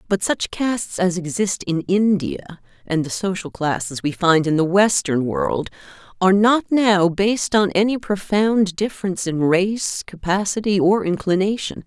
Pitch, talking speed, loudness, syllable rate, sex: 190 Hz, 150 wpm, -19 LUFS, 4.5 syllables/s, female